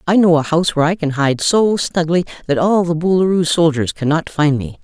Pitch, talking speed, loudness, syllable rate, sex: 165 Hz, 225 wpm, -15 LUFS, 5.6 syllables/s, female